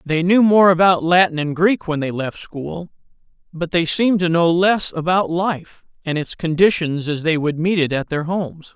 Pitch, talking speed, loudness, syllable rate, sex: 170 Hz, 205 wpm, -18 LUFS, 4.7 syllables/s, male